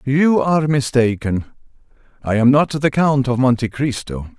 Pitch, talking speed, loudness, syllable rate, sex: 130 Hz, 135 wpm, -17 LUFS, 4.5 syllables/s, male